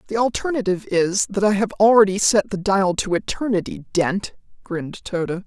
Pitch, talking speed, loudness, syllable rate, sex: 200 Hz, 165 wpm, -20 LUFS, 5.3 syllables/s, female